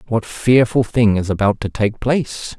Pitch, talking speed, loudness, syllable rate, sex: 110 Hz, 185 wpm, -17 LUFS, 4.6 syllables/s, male